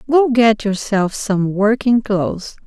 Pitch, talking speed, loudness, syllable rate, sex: 220 Hz, 135 wpm, -16 LUFS, 3.8 syllables/s, female